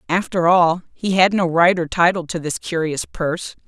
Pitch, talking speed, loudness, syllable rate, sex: 170 Hz, 195 wpm, -18 LUFS, 4.9 syllables/s, female